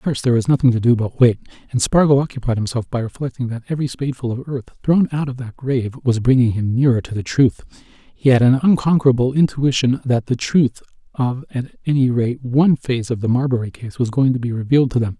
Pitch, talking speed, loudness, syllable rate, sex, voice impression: 125 Hz, 225 wpm, -18 LUFS, 6.3 syllables/s, male, masculine, middle-aged, relaxed, slightly dark, slightly muffled, fluent, slightly raspy, intellectual, slightly mature, unique, slightly strict, modest